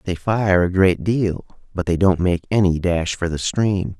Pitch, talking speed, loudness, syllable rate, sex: 95 Hz, 210 wpm, -19 LUFS, 4.3 syllables/s, male